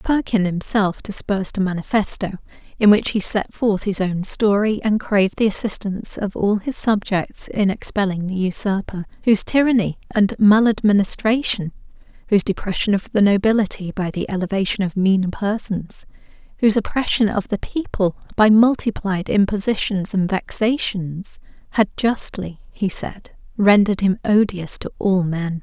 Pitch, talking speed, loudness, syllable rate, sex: 200 Hz, 140 wpm, -19 LUFS, 4.9 syllables/s, female